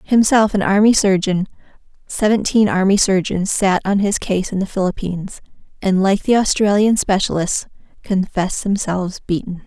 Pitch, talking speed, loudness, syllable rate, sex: 195 Hz, 135 wpm, -17 LUFS, 5.0 syllables/s, female